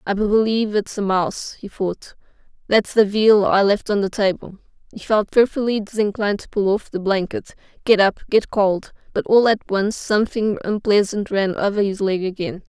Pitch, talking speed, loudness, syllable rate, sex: 205 Hz, 185 wpm, -19 LUFS, 5.1 syllables/s, female